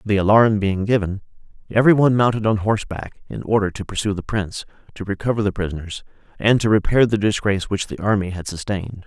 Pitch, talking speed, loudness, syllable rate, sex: 100 Hz, 190 wpm, -19 LUFS, 6.4 syllables/s, male